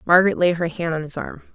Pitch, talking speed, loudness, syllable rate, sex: 170 Hz, 270 wpm, -21 LUFS, 6.8 syllables/s, female